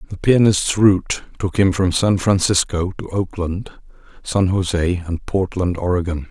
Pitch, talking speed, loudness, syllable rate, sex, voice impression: 95 Hz, 145 wpm, -18 LUFS, 4.3 syllables/s, male, very masculine, very adult-like, slightly old, very thick, slightly relaxed, slightly powerful, slightly weak, dark, slightly soft, muffled, slightly fluent, slightly raspy, very cool, intellectual, sincere, very calm, very mature, friendly, very reassuring, very unique, elegant, very wild, slightly sweet, kind, modest